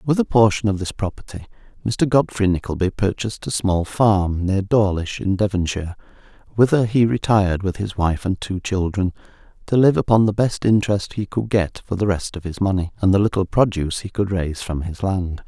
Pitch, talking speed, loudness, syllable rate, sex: 100 Hz, 200 wpm, -20 LUFS, 5.4 syllables/s, male